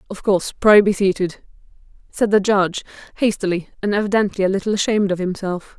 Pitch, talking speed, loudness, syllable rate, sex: 195 Hz, 165 wpm, -18 LUFS, 6.4 syllables/s, female